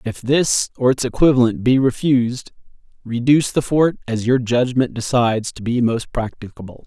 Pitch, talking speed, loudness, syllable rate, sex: 125 Hz, 155 wpm, -18 LUFS, 5.0 syllables/s, male